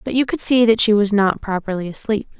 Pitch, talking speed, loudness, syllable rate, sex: 215 Hz, 250 wpm, -17 LUFS, 5.9 syllables/s, female